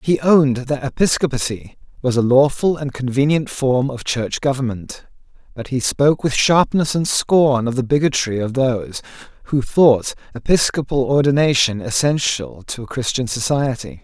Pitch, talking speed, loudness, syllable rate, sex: 135 Hz, 145 wpm, -17 LUFS, 4.8 syllables/s, male